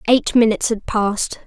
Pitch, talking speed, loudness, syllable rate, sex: 220 Hz, 165 wpm, -18 LUFS, 5.4 syllables/s, female